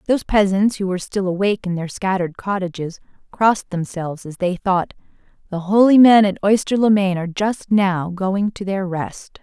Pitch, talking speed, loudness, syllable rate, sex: 195 Hz, 185 wpm, -18 LUFS, 5.3 syllables/s, female